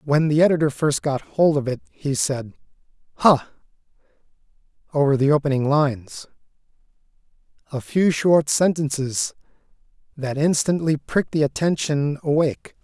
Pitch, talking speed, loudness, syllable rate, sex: 145 Hz, 110 wpm, -21 LUFS, 4.9 syllables/s, male